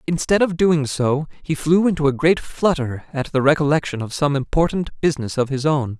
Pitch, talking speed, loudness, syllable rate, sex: 150 Hz, 200 wpm, -19 LUFS, 5.4 syllables/s, male